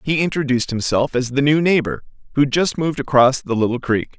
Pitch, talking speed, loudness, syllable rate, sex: 135 Hz, 200 wpm, -18 LUFS, 6.0 syllables/s, male